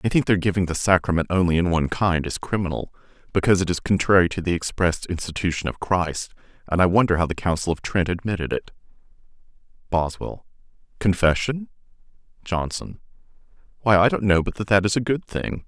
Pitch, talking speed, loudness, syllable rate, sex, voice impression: 90 Hz, 170 wpm, -22 LUFS, 5.9 syllables/s, male, masculine, adult-like, thick, tensed, powerful, clear, cool, intellectual, sincere, calm, slightly mature, friendly, wild, lively